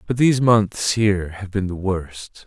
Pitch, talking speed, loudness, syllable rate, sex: 100 Hz, 195 wpm, -20 LUFS, 4.3 syllables/s, male